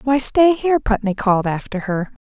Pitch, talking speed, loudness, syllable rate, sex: 230 Hz, 185 wpm, -18 LUFS, 5.4 syllables/s, female